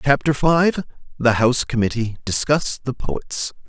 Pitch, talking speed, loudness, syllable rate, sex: 130 Hz, 130 wpm, -20 LUFS, 4.4 syllables/s, male